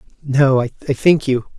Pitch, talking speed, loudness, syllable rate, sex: 135 Hz, 150 wpm, -16 LUFS, 4.0 syllables/s, male